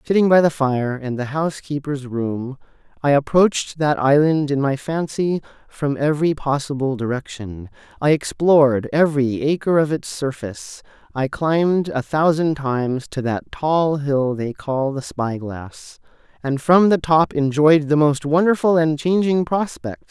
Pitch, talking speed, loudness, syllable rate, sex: 145 Hz, 150 wpm, -19 LUFS, 4.4 syllables/s, male